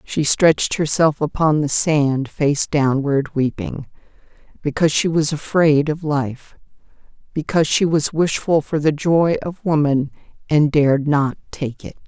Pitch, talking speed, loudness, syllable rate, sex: 150 Hz, 140 wpm, -18 LUFS, 4.3 syllables/s, female